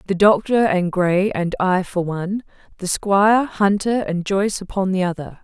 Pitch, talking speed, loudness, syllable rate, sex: 190 Hz, 175 wpm, -19 LUFS, 4.7 syllables/s, female